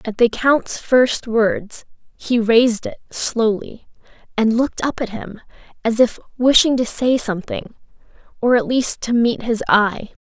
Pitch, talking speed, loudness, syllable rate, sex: 230 Hz, 160 wpm, -18 LUFS, 4.2 syllables/s, female